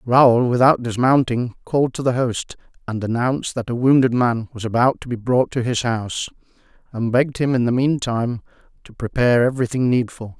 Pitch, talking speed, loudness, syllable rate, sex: 120 Hz, 180 wpm, -19 LUFS, 5.6 syllables/s, male